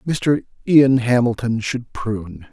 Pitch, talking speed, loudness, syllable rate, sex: 120 Hz, 120 wpm, -18 LUFS, 4.3 syllables/s, male